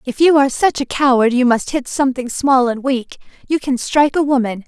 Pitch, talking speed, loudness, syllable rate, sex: 260 Hz, 230 wpm, -16 LUFS, 5.7 syllables/s, female